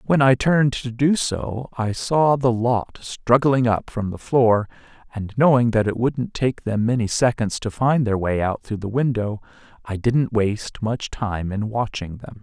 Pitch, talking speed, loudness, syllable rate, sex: 115 Hz, 195 wpm, -21 LUFS, 4.3 syllables/s, male